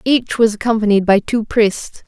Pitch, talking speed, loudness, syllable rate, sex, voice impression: 220 Hz, 175 wpm, -15 LUFS, 4.6 syllables/s, female, very feminine, slightly adult-like, thin, slightly tensed, weak, slightly dark, soft, clear, fluent, cute, intellectual, refreshing, slightly sincere, calm, friendly, reassuring, unique, slightly elegant, slightly wild, sweet, lively, strict, slightly intense, slightly sharp, slightly light